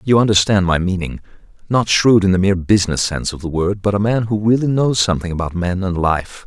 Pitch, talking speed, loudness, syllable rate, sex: 100 Hz, 230 wpm, -16 LUFS, 6.1 syllables/s, male